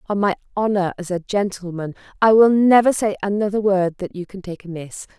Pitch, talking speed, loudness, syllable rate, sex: 195 Hz, 195 wpm, -18 LUFS, 5.6 syllables/s, female